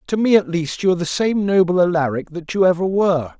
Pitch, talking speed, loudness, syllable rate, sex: 175 Hz, 245 wpm, -18 LUFS, 6.3 syllables/s, male